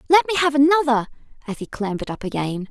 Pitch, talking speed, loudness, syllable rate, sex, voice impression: 260 Hz, 200 wpm, -20 LUFS, 6.8 syllables/s, female, very feminine, slightly young, adult-like, thin, slightly tensed, slightly powerful, slightly dark, hard, slightly clear, fluent, slightly cute, cool, very intellectual, refreshing, very sincere, calm, friendly, reassuring, elegant, slightly wild, slightly sweet, slightly lively, slightly strict, slightly sharp